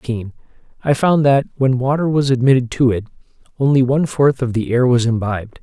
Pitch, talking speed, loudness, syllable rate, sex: 130 Hz, 190 wpm, -16 LUFS, 8.1 syllables/s, male